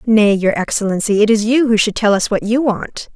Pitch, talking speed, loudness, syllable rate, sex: 215 Hz, 250 wpm, -15 LUFS, 5.4 syllables/s, female